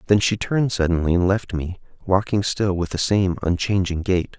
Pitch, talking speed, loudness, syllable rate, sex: 95 Hz, 190 wpm, -21 LUFS, 5.1 syllables/s, male